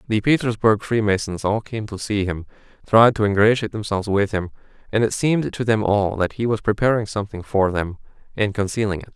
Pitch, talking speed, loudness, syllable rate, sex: 105 Hz, 195 wpm, -20 LUFS, 5.9 syllables/s, male